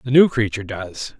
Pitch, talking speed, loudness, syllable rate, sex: 115 Hz, 200 wpm, -20 LUFS, 5.7 syllables/s, male